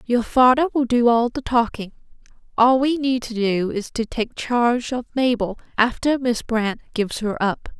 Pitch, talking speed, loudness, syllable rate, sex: 240 Hz, 185 wpm, -20 LUFS, 4.6 syllables/s, female